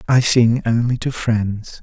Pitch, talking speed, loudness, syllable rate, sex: 115 Hz, 165 wpm, -17 LUFS, 3.7 syllables/s, male